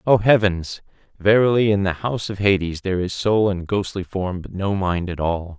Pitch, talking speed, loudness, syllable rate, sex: 95 Hz, 205 wpm, -20 LUFS, 5.1 syllables/s, male